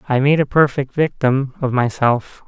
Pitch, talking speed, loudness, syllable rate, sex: 135 Hz, 170 wpm, -17 LUFS, 4.5 syllables/s, male